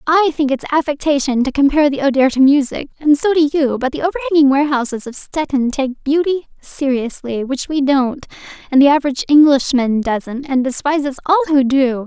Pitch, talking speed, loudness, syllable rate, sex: 280 Hz, 180 wpm, -15 LUFS, 5.7 syllables/s, female